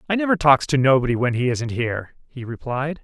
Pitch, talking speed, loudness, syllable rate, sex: 135 Hz, 215 wpm, -20 LUFS, 5.8 syllables/s, male